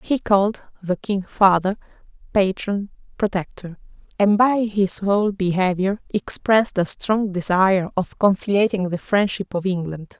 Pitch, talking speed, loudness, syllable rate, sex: 195 Hz, 130 wpm, -20 LUFS, 4.5 syllables/s, female